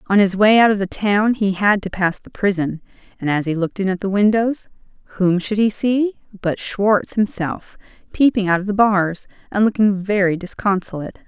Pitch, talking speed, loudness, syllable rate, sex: 200 Hz, 195 wpm, -18 LUFS, 5.1 syllables/s, female